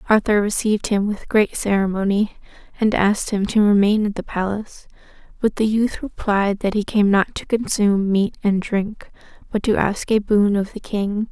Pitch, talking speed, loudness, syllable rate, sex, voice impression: 205 Hz, 185 wpm, -19 LUFS, 4.9 syllables/s, female, very feminine, young, very thin, relaxed, very weak, slightly dark, very soft, muffled, fluent, raspy, cute, intellectual, slightly refreshing, very sincere, very calm, friendly, slightly reassuring, very unique, elegant, slightly wild, very sweet, slightly lively, kind, very modest, very light